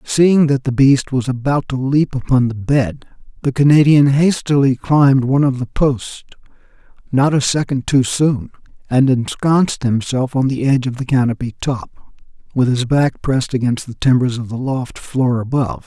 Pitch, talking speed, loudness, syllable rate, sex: 130 Hz, 175 wpm, -16 LUFS, 4.8 syllables/s, male